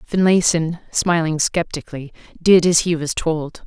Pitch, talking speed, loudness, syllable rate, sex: 165 Hz, 130 wpm, -18 LUFS, 4.4 syllables/s, female